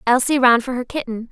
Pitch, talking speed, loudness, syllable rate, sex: 245 Hz, 225 wpm, -18 LUFS, 5.9 syllables/s, female